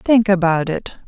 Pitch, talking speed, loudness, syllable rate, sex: 190 Hz, 165 wpm, -17 LUFS, 4.1 syllables/s, female